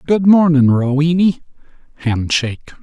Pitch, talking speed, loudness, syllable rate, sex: 150 Hz, 65 wpm, -14 LUFS, 4.9 syllables/s, male